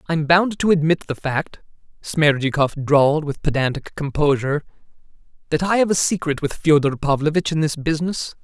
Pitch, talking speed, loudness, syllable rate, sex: 150 Hz, 155 wpm, -19 LUFS, 5.4 syllables/s, male